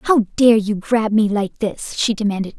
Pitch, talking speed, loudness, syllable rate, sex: 215 Hz, 210 wpm, -18 LUFS, 4.4 syllables/s, female